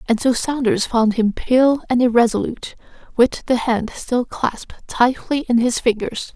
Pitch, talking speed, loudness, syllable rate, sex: 240 Hz, 160 wpm, -18 LUFS, 4.5 syllables/s, female